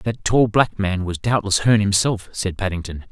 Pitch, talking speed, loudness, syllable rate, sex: 100 Hz, 195 wpm, -19 LUFS, 5.0 syllables/s, male